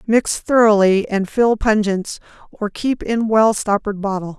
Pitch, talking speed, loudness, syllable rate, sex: 210 Hz, 150 wpm, -17 LUFS, 4.3 syllables/s, female